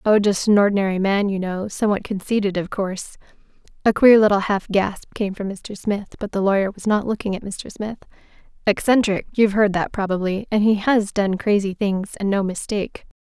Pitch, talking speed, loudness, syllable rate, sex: 200 Hz, 185 wpm, -20 LUFS, 3.8 syllables/s, female